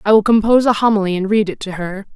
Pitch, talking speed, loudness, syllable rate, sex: 205 Hz, 280 wpm, -15 LUFS, 7.0 syllables/s, female